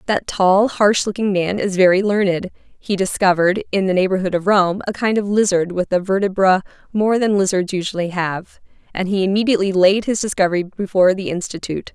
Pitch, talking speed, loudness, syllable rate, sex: 190 Hz, 180 wpm, -17 LUFS, 5.7 syllables/s, female